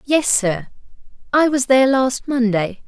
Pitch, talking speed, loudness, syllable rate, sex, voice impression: 245 Hz, 145 wpm, -17 LUFS, 4.2 syllables/s, female, very feminine, young, thin, tensed, slightly powerful, bright, soft, very clear, fluent, very cute, intellectual, very refreshing, slightly sincere, calm, very friendly, very reassuring, unique, very elegant, wild, sweet, lively, kind, slightly sharp, light